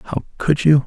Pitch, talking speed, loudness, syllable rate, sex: 145 Hz, 210 wpm, -18 LUFS, 4.2 syllables/s, male